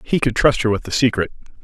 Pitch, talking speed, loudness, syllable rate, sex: 115 Hz, 255 wpm, -18 LUFS, 6.6 syllables/s, male